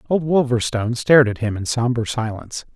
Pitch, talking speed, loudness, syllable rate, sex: 120 Hz, 175 wpm, -19 LUFS, 6.0 syllables/s, male